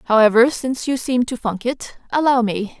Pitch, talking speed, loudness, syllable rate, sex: 240 Hz, 195 wpm, -18 LUFS, 5.0 syllables/s, female